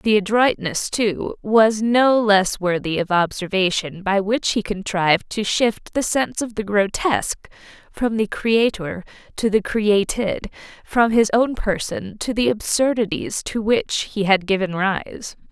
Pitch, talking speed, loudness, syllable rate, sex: 215 Hz, 145 wpm, -20 LUFS, 4.0 syllables/s, female